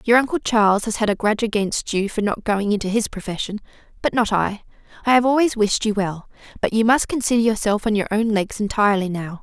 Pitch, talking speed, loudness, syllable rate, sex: 215 Hz, 225 wpm, -20 LUFS, 6.0 syllables/s, female